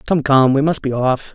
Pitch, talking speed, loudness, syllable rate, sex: 140 Hz, 265 wpm, -16 LUFS, 5.0 syllables/s, male